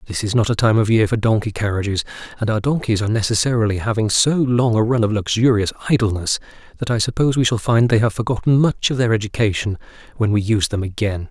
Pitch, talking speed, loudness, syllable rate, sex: 110 Hz, 220 wpm, -18 LUFS, 6.5 syllables/s, male